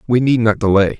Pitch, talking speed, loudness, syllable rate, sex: 115 Hz, 240 wpm, -14 LUFS, 6.0 syllables/s, male